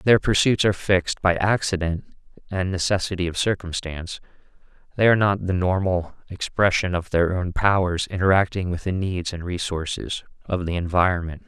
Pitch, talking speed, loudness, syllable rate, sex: 90 Hz, 150 wpm, -22 LUFS, 5.3 syllables/s, male